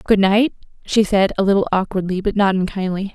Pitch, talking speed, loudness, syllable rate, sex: 195 Hz, 190 wpm, -18 LUFS, 5.8 syllables/s, female